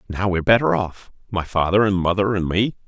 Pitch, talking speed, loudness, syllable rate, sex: 95 Hz, 190 wpm, -20 LUFS, 5.7 syllables/s, male